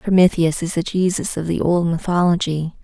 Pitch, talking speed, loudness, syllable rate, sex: 170 Hz, 170 wpm, -19 LUFS, 5.1 syllables/s, female